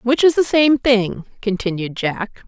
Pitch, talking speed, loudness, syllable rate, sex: 230 Hz, 170 wpm, -17 LUFS, 4.0 syllables/s, female